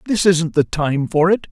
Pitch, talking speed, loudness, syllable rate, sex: 170 Hz, 240 wpm, -17 LUFS, 4.6 syllables/s, male